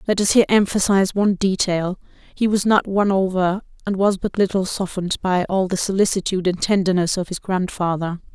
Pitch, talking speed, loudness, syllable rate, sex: 190 Hz, 180 wpm, -20 LUFS, 5.8 syllables/s, female